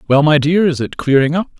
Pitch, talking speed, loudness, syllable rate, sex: 150 Hz, 265 wpm, -14 LUFS, 5.8 syllables/s, male